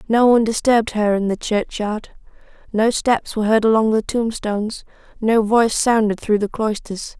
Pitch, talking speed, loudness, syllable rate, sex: 220 Hz, 150 wpm, -18 LUFS, 5.1 syllables/s, female